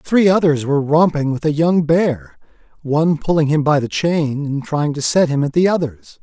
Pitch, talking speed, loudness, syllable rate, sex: 150 Hz, 210 wpm, -16 LUFS, 4.9 syllables/s, male